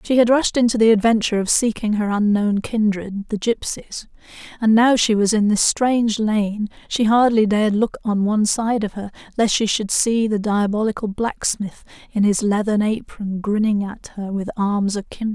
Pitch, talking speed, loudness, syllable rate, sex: 215 Hz, 185 wpm, -19 LUFS, 4.9 syllables/s, female